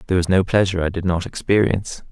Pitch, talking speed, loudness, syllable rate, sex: 95 Hz, 225 wpm, -19 LUFS, 7.4 syllables/s, male